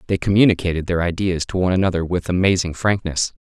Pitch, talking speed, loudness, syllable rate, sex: 90 Hz, 175 wpm, -19 LUFS, 6.6 syllables/s, male